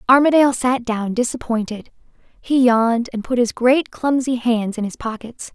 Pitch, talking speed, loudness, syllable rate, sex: 240 Hz, 160 wpm, -18 LUFS, 4.9 syllables/s, female